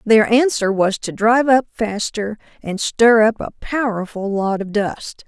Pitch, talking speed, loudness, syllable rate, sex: 220 Hz, 170 wpm, -17 LUFS, 4.2 syllables/s, female